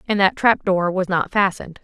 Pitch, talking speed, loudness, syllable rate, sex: 190 Hz, 230 wpm, -19 LUFS, 5.6 syllables/s, female